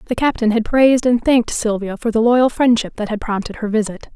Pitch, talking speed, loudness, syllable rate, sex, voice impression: 230 Hz, 230 wpm, -17 LUFS, 5.6 syllables/s, female, feminine, adult-like, fluent, slightly sincere, calm, friendly